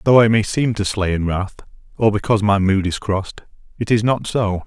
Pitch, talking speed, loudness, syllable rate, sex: 105 Hz, 230 wpm, -18 LUFS, 5.5 syllables/s, male